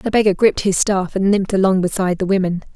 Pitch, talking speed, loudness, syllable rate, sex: 195 Hz, 240 wpm, -17 LUFS, 6.9 syllables/s, female